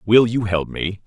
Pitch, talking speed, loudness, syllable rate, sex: 105 Hz, 225 wpm, -19 LUFS, 4.3 syllables/s, male